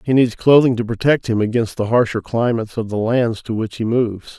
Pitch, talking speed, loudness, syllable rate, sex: 115 Hz, 235 wpm, -18 LUFS, 5.6 syllables/s, male